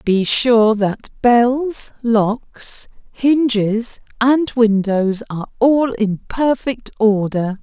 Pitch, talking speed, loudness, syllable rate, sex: 230 Hz, 100 wpm, -16 LUFS, 2.7 syllables/s, female